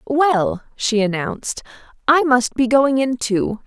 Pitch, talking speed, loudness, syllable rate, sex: 250 Hz, 150 wpm, -18 LUFS, 3.7 syllables/s, female